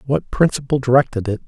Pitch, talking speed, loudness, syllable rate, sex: 130 Hz, 165 wpm, -18 LUFS, 6.3 syllables/s, male